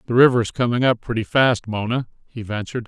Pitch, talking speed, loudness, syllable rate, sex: 115 Hz, 190 wpm, -20 LUFS, 5.8 syllables/s, male